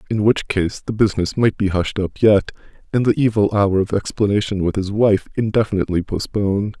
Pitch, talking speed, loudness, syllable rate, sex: 100 Hz, 185 wpm, -18 LUFS, 5.7 syllables/s, male